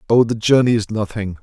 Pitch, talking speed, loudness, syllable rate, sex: 110 Hz, 210 wpm, -17 LUFS, 5.8 syllables/s, male